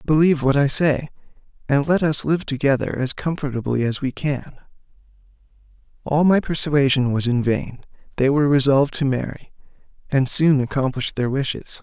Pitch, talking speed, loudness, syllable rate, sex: 140 Hz, 150 wpm, -20 LUFS, 5.4 syllables/s, male